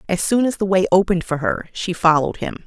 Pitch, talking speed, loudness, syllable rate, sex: 185 Hz, 245 wpm, -19 LUFS, 6.5 syllables/s, female